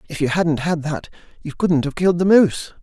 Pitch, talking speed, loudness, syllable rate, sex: 160 Hz, 235 wpm, -18 LUFS, 5.9 syllables/s, male